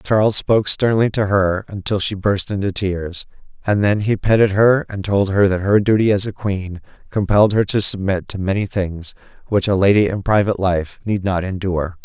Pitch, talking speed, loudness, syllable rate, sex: 100 Hz, 200 wpm, -17 LUFS, 5.2 syllables/s, male